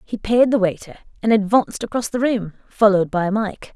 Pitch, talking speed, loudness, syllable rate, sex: 210 Hz, 190 wpm, -19 LUFS, 5.5 syllables/s, female